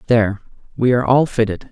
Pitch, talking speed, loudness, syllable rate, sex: 115 Hz, 175 wpm, -17 LUFS, 6.8 syllables/s, male